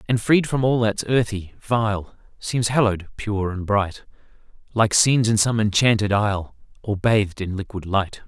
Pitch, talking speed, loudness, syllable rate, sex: 105 Hz, 165 wpm, -21 LUFS, 4.7 syllables/s, male